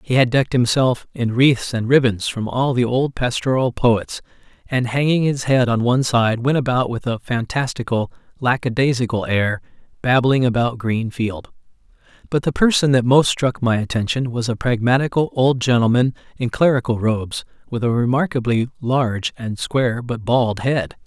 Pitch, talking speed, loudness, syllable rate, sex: 125 Hz, 160 wpm, -19 LUFS, 5.0 syllables/s, male